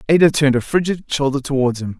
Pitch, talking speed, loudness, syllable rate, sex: 140 Hz, 210 wpm, -17 LUFS, 6.6 syllables/s, male